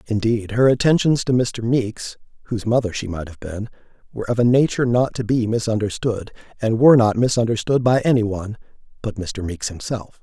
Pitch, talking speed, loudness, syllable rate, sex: 115 Hz, 175 wpm, -19 LUFS, 5.6 syllables/s, male